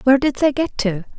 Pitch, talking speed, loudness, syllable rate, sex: 255 Hz, 255 wpm, -19 LUFS, 6.1 syllables/s, female